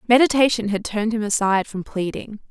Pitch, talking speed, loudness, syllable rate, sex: 215 Hz, 170 wpm, -20 LUFS, 6.2 syllables/s, female